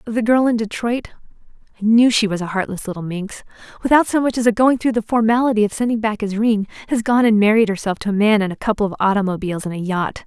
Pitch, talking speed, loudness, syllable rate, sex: 215 Hz, 230 wpm, -18 LUFS, 6.5 syllables/s, female